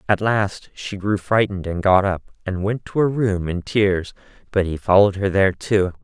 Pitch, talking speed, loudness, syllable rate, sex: 100 Hz, 200 wpm, -20 LUFS, 4.8 syllables/s, male